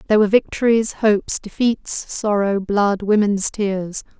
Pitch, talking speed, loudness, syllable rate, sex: 205 Hz, 130 wpm, -19 LUFS, 4.4 syllables/s, female